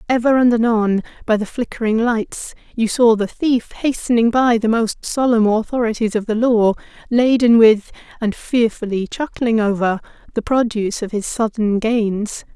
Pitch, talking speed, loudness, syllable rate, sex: 225 Hz, 155 wpm, -17 LUFS, 4.6 syllables/s, female